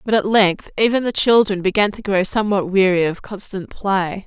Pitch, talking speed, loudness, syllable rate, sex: 200 Hz, 195 wpm, -17 LUFS, 5.2 syllables/s, female